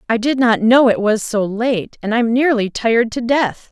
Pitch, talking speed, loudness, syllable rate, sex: 230 Hz, 225 wpm, -16 LUFS, 4.6 syllables/s, female